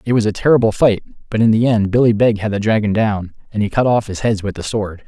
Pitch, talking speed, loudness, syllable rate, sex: 110 Hz, 285 wpm, -16 LUFS, 6.2 syllables/s, male